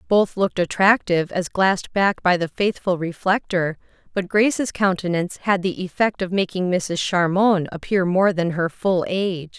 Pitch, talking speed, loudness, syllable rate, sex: 185 Hz, 165 wpm, -21 LUFS, 4.8 syllables/s, female